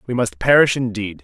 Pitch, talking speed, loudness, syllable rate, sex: 115 Hz, 195 wpm, -17 LUFS, 5.5 syllables/s, male